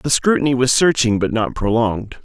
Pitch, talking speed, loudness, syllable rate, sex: 120 Hz, 190 wpm, -17 LUFS, 5.6 syllables/s, male